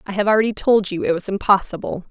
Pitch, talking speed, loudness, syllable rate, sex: 200 Hz, 230 wpm, -19 LUFS, 6.6 syllables/s, female